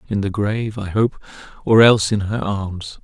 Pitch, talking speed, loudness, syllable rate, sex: 105 Hz, 200 wpm, -18 LUFS, 5.0 syllables/s, male